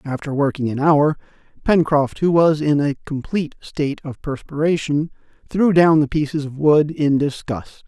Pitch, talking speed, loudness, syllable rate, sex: 150 Hz, 160 wpm, -19 LUFS, 4.7 syllables/s, male